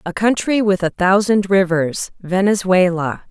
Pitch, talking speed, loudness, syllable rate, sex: 190 Hz, 110 wpm, -16 LUFS, 4.2 syllables/s, female